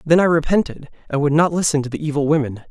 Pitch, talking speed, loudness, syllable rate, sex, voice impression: 155 Hz, 245 wpm, -18 LUFS, 6.8 syllables/s, male, masculine, adult-like, slightly powerful, very fluent, refreshing, slightly unique